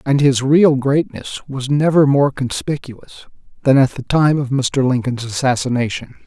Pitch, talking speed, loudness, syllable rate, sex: 135 Hz, 155 wpm, -16 LUFS, 4.5 syllables/s, male